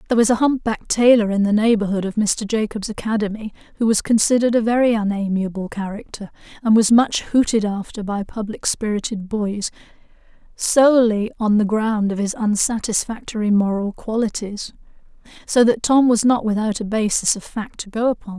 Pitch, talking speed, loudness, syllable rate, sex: 215 Hz, 165 wpm, -19 LUFS, 5.4 syllables/s, female